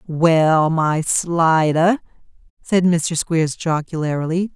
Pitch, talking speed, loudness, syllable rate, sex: 165 Hz, 90 wpm, -18 LUFS, 2.9 syllables/s, female